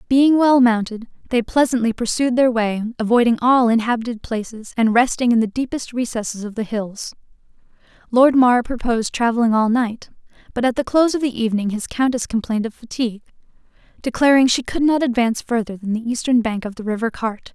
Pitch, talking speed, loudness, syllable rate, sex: 235 Hz, 180 wpm, -19 LUFS, 5.9 syllables/s, female